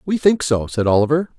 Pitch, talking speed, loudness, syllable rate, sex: 150 Hz, 215 wpm, -17 LUFS, 5.7 syllables/s, male